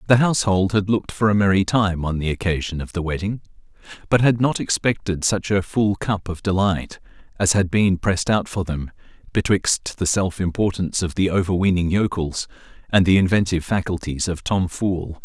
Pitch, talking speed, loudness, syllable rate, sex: 95 Hz, 180 wpm, -20 LUFS, 5.3 syllables/s, male